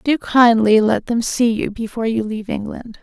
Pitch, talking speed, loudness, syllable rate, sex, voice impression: 225 Hz, 200 wpm, -17 LUFS, 5.1 syllables/s, female, very feminine, slightly young, slightly adult-like, very thin, slightly tensed, weak, slightly dark, hard, clear, fluent, slightly raspy, very cute, very intellectual, very refreshing, sincere, calm, very friendly, very reassuring, unique, very elegant, slightly wild, very sweet, slightly lively, very kind, modest